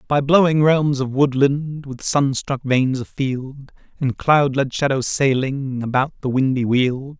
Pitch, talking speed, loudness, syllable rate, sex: 135 Hz, 150 wpm, -19 LUFS, 4.1 syllables/s, male